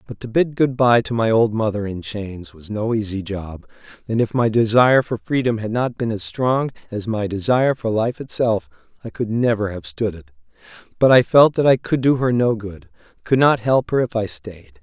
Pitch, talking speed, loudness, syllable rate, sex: 110 Hz, 225 wpm, -19 LUFS, 5.1 syllables/s, male